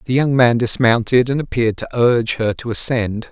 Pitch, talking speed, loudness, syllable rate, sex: 120 Hz, 200 wpm, -16 LUFS, 5.5 syllables/s, male